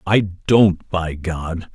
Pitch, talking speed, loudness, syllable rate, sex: 90 Hz, 140 wpm, -19 LUFS, 2.5 syllables/s, male